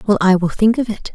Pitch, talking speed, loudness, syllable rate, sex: 205 Hz, 315 wpm, -16 LUFS, 6.1 syllables/s, female